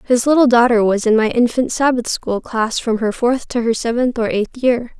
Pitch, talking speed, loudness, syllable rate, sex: 235 Hz, 230 wpm, -16 LUFS, 5.0 syllables/s, female